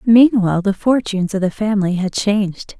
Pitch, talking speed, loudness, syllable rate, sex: 205 Hz, 170 wpm, -16 LUFS, 5.6 syllables/s, female